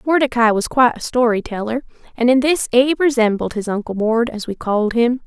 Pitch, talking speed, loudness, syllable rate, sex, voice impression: 240 Hz, 205 wpm, -17 LUFS, 5.8 syllables/s, female, very feminine, slightly adult-like, slightly thin, tensed, slightly powerful, bright, hard, clear, fluent, cute, very intellectual, refreshing, sincere, slightly calm, friendly, reassuring, very unique, slightly elegant, wild, very sweet, very lively, slightly intense, very sharp, light